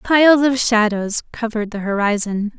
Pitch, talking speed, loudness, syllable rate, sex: 225 Hz, 140 wpm, -17 LUFS, 5.1 syllables/s, female